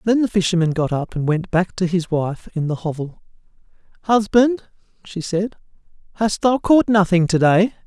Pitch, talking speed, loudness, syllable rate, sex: 190 Hz, 175 wpm, -19 LUFS, 4.9 syllables/s, male